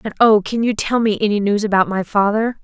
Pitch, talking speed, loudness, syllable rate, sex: 210 Hz, 250 wpm, -17 LUFS, 5.8 syllables/s, female